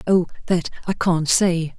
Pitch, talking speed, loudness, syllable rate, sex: 175 Hz, 170 wpm, -20 LUFS, 4.0 syllables/s, female